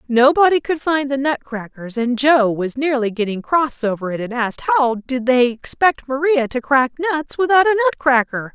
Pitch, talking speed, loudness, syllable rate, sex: 270 Hz, 180 wpm, -17 LUFS, 5.0 syllables/s, female